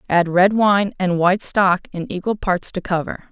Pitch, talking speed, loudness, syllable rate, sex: 185 Hz, 200 wpm, -18 LUFS, 4.7 syllables/s, female